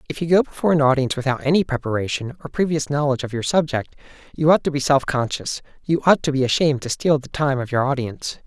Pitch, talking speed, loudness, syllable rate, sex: 140 Hz, 225 wpm, -20 LUFS, 6.8 syllables/s, male